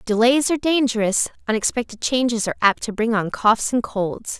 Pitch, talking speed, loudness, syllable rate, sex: 230 Hz, 180 wpm, -20 LUFS, 5.4 syllables/s, female